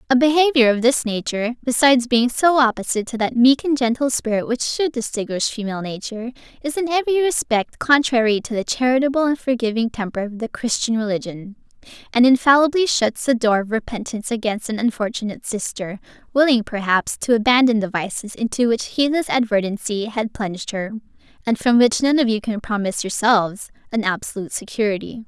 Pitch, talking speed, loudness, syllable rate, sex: 235 Hz, 170 wpm, -19 LUFS, 5.9 syllables/s, female